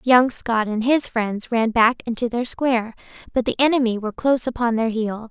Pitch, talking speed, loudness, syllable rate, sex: 235 Hz, 205 wpm, -20 LUFS, 5.3 syllables/s, female